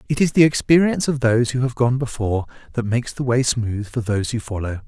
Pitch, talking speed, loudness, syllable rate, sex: 120 Hz, 235 wpm, -20 LUFS, 6.4 syllables/s, male